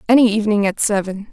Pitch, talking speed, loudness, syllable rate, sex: 210 Hz, 180 wpm, -16 LUFS, 7.1 syllables/s, female